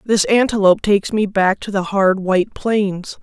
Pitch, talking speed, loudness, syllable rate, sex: 200 Hz, 185 wpm, -16 LUFS, 4.8 syllables/s, female